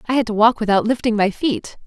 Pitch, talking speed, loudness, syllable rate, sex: 215 Hz, 255 wpm, -18 LUFS, 6.1 syllables/s, female